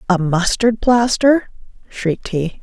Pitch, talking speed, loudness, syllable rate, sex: 210 Hz, 115 wpm, -16 LUFS, 3.9 syllables/s, female